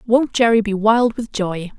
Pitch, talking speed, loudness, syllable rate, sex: 220 Hz, 200 wpm, -17 LUFS, 4.4 syllables/s, female